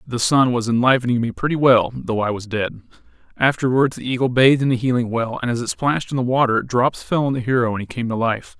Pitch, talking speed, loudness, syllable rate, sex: 125 Hz, 250 wpm, -19 LUFS, 6.2 syllables/s, male